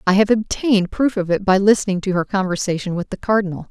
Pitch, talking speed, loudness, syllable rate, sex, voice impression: 195 Hz, 225 wpm, -18 LUFS, 6.4 syllables/s, female, feminine, adult-like, sincere, slightly calm, elegant